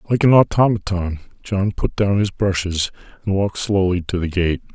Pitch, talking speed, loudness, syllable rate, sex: 95 Hz, 175 wpm, -19 LUFS, 5.1 syllables/s, male